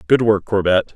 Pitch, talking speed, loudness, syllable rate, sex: 105 Hz, 190 wpm, -17 LUFS, 5.1 syllables/s, male